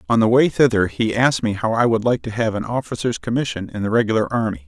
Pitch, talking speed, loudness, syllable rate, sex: 110 Hz, 255 wpm, -19 LUFS, 6.5 syllables/s, male